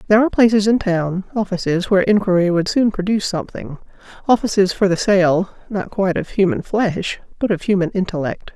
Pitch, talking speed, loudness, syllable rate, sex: 195 Hz, 155 wpm, -18 LUFS, 5.9 syllables/s, female